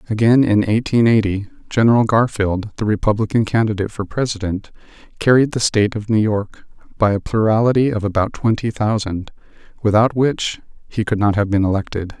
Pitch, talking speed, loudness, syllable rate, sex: 110 Hz, 155 wpm, -17 LUFS, 5.6 syllables/s, male